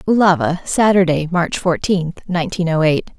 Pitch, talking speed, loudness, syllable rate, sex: 180 Hz, 130 wpm, -16 LUFS, 4.8 syllables/s, female